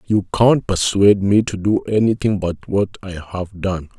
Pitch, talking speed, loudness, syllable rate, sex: 100 Hz, 180 wpm, -18 LUFS, 4.5 syllables/s, male